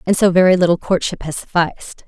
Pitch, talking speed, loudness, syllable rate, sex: 180 Hz, 200 wpm, -16 LUFS, 6.2 syllables/s, female